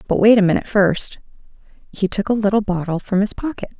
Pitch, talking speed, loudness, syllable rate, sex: 200 Hz, 205 wpm, -18 LUFS, 6.0 syllables/s, female